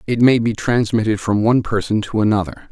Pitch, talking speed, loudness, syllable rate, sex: 110 Hz, 200 wpm, -17 LUFS, 5.8 syllables/s, male